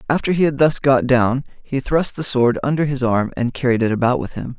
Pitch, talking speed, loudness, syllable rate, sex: 130 Hz, 250 wpm, -18 LUFS, 5.5 syllables/s, male